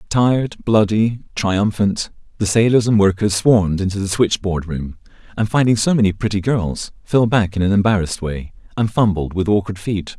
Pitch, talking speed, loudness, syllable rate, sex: 100 Hz, 170 wpm, -17 LUFS, 5.1 syllables/s, male